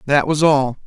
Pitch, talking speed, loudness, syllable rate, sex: 145 Hz, 210 wpm, -16 LUFS, 4.7 syllables/s, male